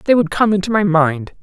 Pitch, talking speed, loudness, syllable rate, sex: 210 Hz, 255 wpm, -15 LUFS, 5.3 syllables/s, female